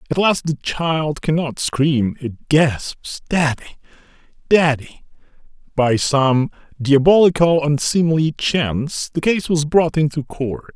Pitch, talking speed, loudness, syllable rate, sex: 150 Hz, 115 wpm, -18 LUFS, 3.7 syllables/s, male